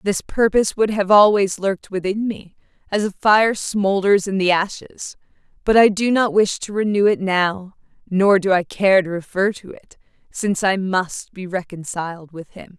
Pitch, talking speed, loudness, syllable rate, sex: 195 Hz, 185 wpm, -18 LUFS, 4.6 syllables/s, female